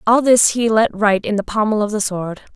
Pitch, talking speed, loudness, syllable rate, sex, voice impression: 215 Hz, 260 wpm, -16 LUFS, 5.6 syllables/s, female, feminine, adult-like, tensed, bright, soft, intellectual, friendly, elegant, lively, kind